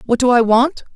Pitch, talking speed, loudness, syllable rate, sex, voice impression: 245 Hz, 250 wpm, -14 LUFS, 5.5 syllables/s, female, feminine, slightly gender-neutral, slightly young, slightly adult-like, thin, tensed, powerful, bright, slightly hard, clear, fluent, slightly cute, cool, very intellectual, refreshing, sincere, calm, friendly, very reassuring, slightly unique, very elegant, sweet, slightly lively, very kind, modest